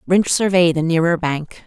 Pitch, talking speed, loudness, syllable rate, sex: 170 Hz, 180 wpm, -17 LUFS, 4.6 syllables/s, female